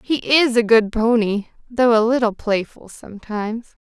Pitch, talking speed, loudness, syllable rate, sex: 225 Hz, 155 wpm, -18 LUFS, 4.6 syllables/s, female